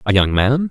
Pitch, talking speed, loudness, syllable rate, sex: 115 Hz, 255 wpm, -16 LUFS, 5.1 syllables/s, male